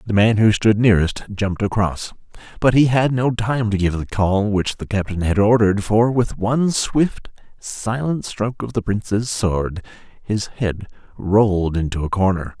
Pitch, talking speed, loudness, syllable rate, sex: 105 Hz, 175 wpm, -19 LUFS, 4.7 syllables/s, male